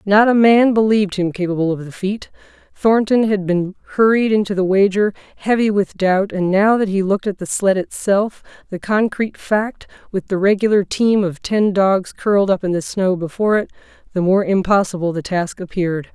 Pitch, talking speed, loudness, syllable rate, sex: 195 Hz, 190 wpm, -17 LUFS, 5.2 syllables/s, female